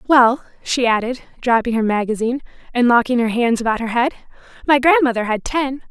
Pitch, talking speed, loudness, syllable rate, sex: 245 Hz, 175 wpm, -17 LUFS, 5.8 syllables/s, female